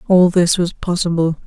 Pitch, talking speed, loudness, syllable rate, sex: 175 Hz, 165 wpm, -16 LUFS, 4.7 syllables/s, female